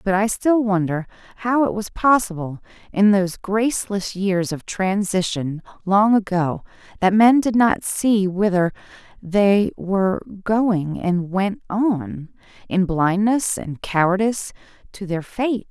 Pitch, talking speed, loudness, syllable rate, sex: 200 Hz, 135 wpm, -20 LUFS, 3.9 syllables/s, female